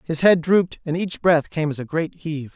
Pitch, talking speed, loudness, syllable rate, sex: 160 Hz, 260 wpm, -21 LUFS, 5.5 syllables/s, male